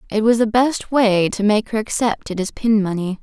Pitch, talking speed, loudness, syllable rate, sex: 215 Hz, 240 wpm, -18 LUFS, 5.0 syllables/s, female